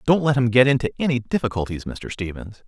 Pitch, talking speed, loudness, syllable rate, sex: 120 Hz, 200 wpm, -21 LUFS, 6.2 syllables/s, male